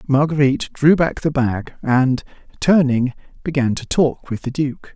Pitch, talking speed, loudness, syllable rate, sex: 140 Hz, 155 wpm, -18 LUFS, 4.4 syllables/s, male